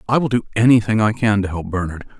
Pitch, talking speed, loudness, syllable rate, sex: 105 Hz, 245 wpm, -18 LUFS, 6.6 syllables/s, male